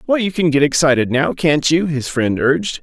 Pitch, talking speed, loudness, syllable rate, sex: 150 Hz, 235 wpm, -16 LUFS, 5.2 syllables/s, male